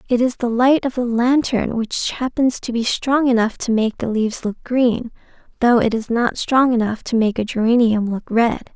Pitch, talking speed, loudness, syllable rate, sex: 235 Hz, 210 wpm, -18 LUFS, 4.7 syllables/s, female